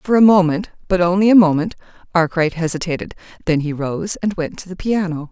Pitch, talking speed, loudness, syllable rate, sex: 175 Hz, 170 wpm, -17 LUFS, 5.8 syllables/s, female